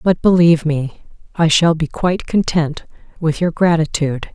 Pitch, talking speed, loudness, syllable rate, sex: 160 Hz, 150 wpm, -16 LUFS, 5.0 syllables/s, female